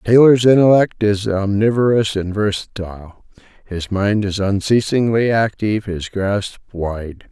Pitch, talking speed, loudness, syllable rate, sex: 105 Hz, 105 wpm, -16 LUFS, 4.3 syllables/s, male